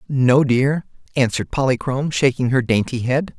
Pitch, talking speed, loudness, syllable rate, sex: 130 Hz, 140 wpm, -19 LUFS, 5.1 syllables/s, male